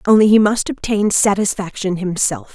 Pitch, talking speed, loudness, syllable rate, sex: 195 Hz, 140 wpm, -16 LUFS, 5.0 syllables/s, female